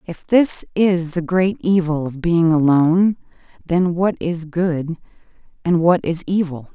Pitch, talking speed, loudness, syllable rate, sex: 170 Hz, 150 wpm, -18 LUFS, 4.0 syllables/s, female